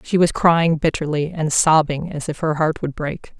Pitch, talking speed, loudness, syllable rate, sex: 155 Hz, 210 wpm, -19 LUFS, 4.6 syllables/s, female